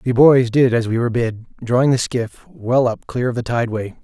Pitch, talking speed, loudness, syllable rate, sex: 120 Hz, 240 wpm, -17 LUFS, 5.4 syllables/s, male